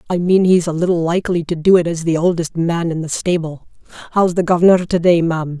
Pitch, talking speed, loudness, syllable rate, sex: 170 Hz, 235 wpm, -16 LUFS, 5.9 syllables/s, female